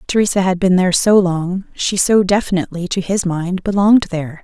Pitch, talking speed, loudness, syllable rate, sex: 185 Hz, 190 wpm, -15 LUFS, 5.7 syllables/s, female